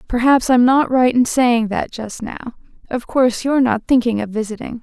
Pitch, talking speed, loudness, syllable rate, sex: 240 Hz, 200 wpm, -17 LUFS, 5.3 syllables/s, female